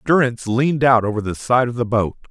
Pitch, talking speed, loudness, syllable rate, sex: 120 Hz, 235 wpm, -18 LUFS, 6.2 syllables/s, male